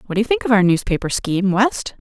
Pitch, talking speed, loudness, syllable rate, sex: 205 Hz, 260 wpm, -18 LUFS, 6.5 syllables/s, female